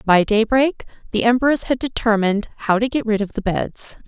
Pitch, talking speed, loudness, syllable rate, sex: 225 Hz, 190 wpm, -19 LUFS, 5.2 syllables/s, female